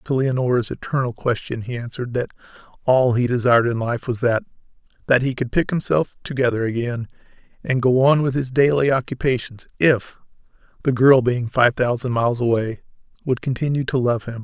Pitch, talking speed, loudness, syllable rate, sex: 125 Hz, 160 wpm, -20 LUFS, 5.6 syllables/s, male